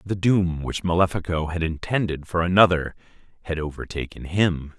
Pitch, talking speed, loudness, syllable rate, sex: 85 Hz, 140 wpm, -23 LUFS, 5.1 syllables/s, male